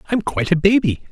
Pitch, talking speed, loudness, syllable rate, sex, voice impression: 180 Hz, 215 wpm, -17 LUFS, 6.7 syllables/s, male, very masculine, very adult-like, slightly thick, cool, sincere, slightly calm